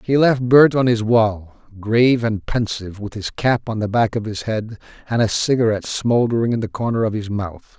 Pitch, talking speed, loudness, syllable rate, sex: 110 Hz, 215 wpm, -18 LUFS, 5.2 syllables/s, male